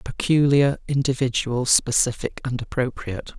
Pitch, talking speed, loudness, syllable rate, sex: 130 Hz, 90 wpm, -22 LUFS, 4.8 syllables/s, male